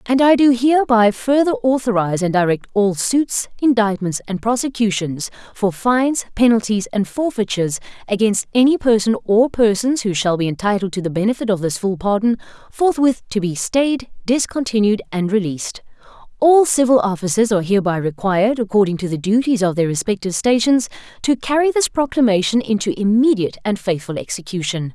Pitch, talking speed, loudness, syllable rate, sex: 215 Hz, 155 wpm, -17 LUFS, 5.6 syllables/s, female